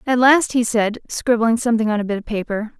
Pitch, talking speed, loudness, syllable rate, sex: 230 Hz, 235 wpm, -18 LUFS, 5.9 syllables/s, female